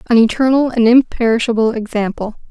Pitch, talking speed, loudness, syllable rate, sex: 235 Hz, 120 wpm, -14 LUFS, 5.7 syllables/s, female